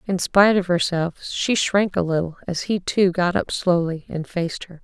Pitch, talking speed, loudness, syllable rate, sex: 180 Hz, 210 wpm, -21 LUFS, 4.9 syllables/s, female